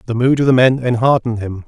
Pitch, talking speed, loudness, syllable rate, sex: 120 Hz, 250 wpm, -14 LUFS, 6.6 syllables/s, male